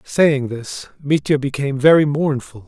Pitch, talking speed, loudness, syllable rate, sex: 140 Hz, 135 wpm, -17 LUFS, 4.5 syllables/s, male